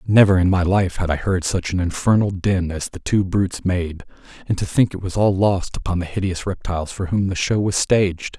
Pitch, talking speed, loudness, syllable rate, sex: 95 Hz, 235 wpm, -20 LUFS, 5.4 syllables/s, male